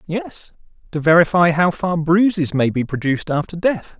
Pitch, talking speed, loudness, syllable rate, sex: 165 Hz, 165 wpm, -17 LUFS, 4.9 syllables/s, male